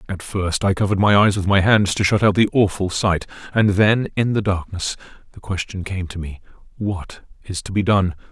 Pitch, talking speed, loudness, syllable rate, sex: 95 Hz, 215 wpm, -19 LUFS, 5.2 syllables/s, male